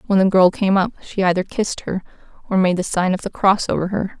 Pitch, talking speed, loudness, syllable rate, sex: 190 Hz, 255 wpm, -19 LUFS, 6.0 syllables/s, female